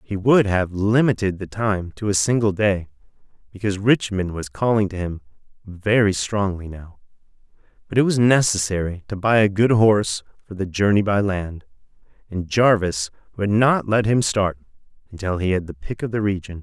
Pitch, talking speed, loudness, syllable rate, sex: 100 Hz, 175 wpm, -20 LUFS, 5.0 syllables/s, male